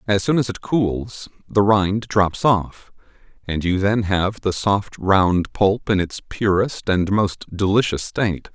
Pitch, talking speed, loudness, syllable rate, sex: 100 Hz, 170 wpm, -20 LUFS, 3.7 syllables/s, male